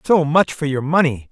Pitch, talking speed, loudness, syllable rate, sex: 150 Hz, 230 wpm, -17 LUFS, 5.0 syllables/s, male